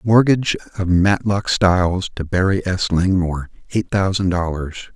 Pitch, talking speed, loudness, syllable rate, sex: 95 Hz, 135 wpm, -18 LUFS, 4.8 syllables/s, male